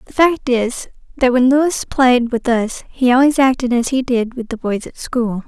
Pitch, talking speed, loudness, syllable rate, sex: 250 Hz, 220 wpm, -16 LUFS, 4.5 syllables/s, female